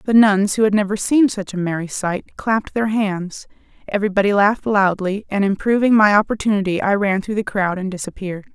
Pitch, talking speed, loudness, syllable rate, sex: 200 Hz, 190 wpm, -18 LUFS, 5.7 syllables/s, female